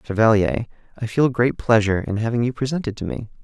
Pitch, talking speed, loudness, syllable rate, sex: 115 Hz, 190 wpm, -20 LUFS, 6.3 syllables/s, male